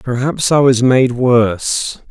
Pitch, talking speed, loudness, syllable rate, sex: 125 Hz, 140 wpm, -13 LUFS, 3.6 syllables/s, male